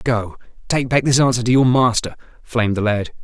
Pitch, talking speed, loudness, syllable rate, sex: 120 Hz, 205 wpm, -17 LUFS, 5.6 syllables/s, male